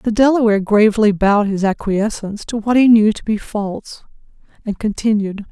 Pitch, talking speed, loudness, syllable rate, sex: 215 Hz, 165 wpm, -16 LUFS, 5.6 syllables/s, female